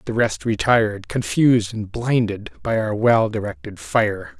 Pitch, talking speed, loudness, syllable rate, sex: 110 Hz, 150 wpm, -20 LUFS, 4.4 syllables/s, male